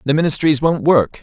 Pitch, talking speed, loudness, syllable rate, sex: 150 Hz, 195 wpm, -15 LUFS, 5.3 syllables/s, male